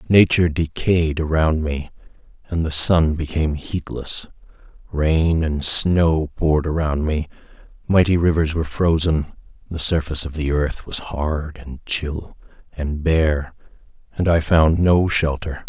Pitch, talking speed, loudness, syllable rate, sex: 80 Hz, 135 wpm, -19 LUFS, 4.1 syllables/s, male